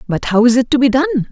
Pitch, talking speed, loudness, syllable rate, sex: 255 Hz, 320 wpm, -13 LUFS, 7.5 syllables/s, female